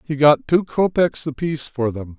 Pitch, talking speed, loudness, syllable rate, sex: 145 Hz, 190 wpm, -19 LUFS, 4.9 syllables/s, male